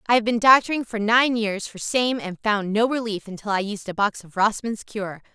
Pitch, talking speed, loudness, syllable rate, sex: 215 Hz, 235 wpm, -22 LUFS, 5.2 syllables/s, female